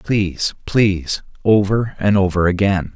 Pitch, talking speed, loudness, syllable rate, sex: 95 Hz, 120 wpm, -17 LUFS, 4.4 syllables/s, male